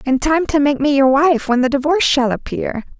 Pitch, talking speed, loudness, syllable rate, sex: 280 Hz, 240 wpm, -15 LUFS, 5.4 syllables/s, female